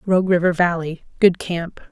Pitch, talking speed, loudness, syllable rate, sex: 175 Hz, 125 wpm, -19 LUFS, 5.0 syllables/s, female